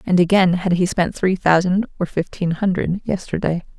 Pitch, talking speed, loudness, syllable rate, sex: 180 Hz, 175 wpm, -19 LUFS, 5.0 syllables/s, female